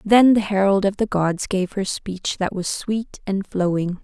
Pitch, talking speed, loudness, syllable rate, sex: 195 Hz, 210 wpm, -21 LUFS, 4.1 syllables/s, female